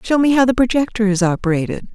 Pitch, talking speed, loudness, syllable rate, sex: 225 Hz, 215 wpm, -16 LUFS, 6.6 syllables/s, female